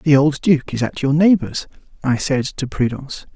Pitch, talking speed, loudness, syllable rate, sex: 140 Hz, 195 wpm, -18 LUFS, 4.9 syllables/s, male